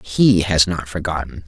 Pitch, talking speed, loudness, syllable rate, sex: 85 Hz, 165 wpm, -18 LUFS, 4.2 syllables/s, male